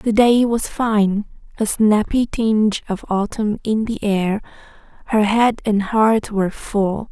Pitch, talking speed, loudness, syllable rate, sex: 215 Hz, 150 wpm, -18 LUFS, 3.8 syllables/s, female